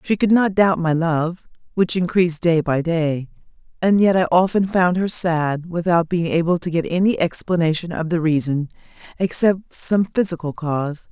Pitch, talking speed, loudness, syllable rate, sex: 170 Hz, 175 wpm, -19 LUFS, 4.7 syllables/s, female